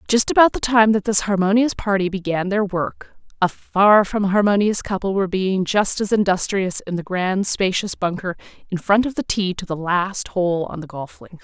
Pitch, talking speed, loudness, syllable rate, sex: 195 Hz, 205 wpm, -19 LUFS, 4.9 syllables/s, female